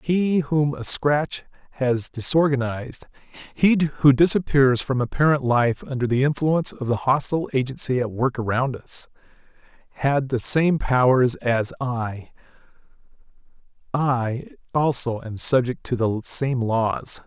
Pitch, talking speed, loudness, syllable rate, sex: 130 Hz, 125 wpm, -21 LUFS, 4.2 syllables/s, male